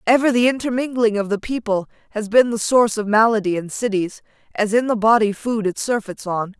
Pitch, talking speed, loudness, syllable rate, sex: 220 Hz, 200 wpm, -19 LUFS, 5.6 syllables/s, female